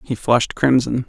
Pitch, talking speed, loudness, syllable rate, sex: 125 Hz, 165 wpm, -17 LUFS, 5.2 syllables/s, male